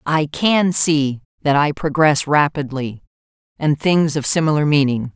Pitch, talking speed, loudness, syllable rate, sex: 150 Hz, 140 wpm, -17 LUFS, 4.2 syllables/s, female